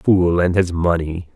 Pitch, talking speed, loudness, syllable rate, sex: 85 Hz, 175 wpm, -18 LUFS, 3.9 syllables/s, male